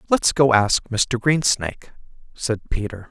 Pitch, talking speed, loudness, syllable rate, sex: 120 Hz, 135 wpm, -20 LUFS, 4.3 syllables/s, male